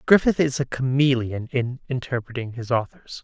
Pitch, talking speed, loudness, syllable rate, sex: 130 Hz, 150 wpm, -23 LUFS, 5.0 syllables/s, male